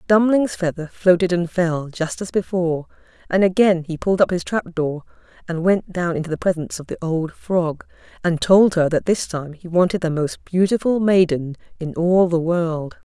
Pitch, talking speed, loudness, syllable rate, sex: 175 Hz, 190 wpm, -20 LUFS, 4.9 syllables/s, female